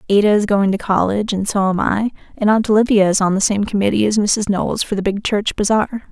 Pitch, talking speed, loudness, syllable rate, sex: 205 Hz, 245 wpm, -16 LUFS, 6.1 syllables/s, female